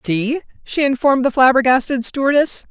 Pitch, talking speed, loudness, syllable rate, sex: 260 Hz, 135 wpm, -16 LUFS, 5.6 syllables/s, female